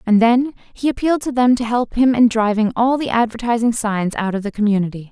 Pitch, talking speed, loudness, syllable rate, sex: 230 Hz, 225 wpm, -17 LUFS, 5.9 syllables/s, female